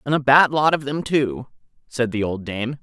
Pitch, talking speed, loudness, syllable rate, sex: 130 Hz, 235 wpm, -20 LUFS, 4.0 syllables/s, male